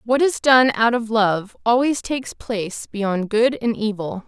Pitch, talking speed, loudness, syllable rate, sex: 225 Hz, 180 wpm, -19 LUFS, 4.2 syllables/s, female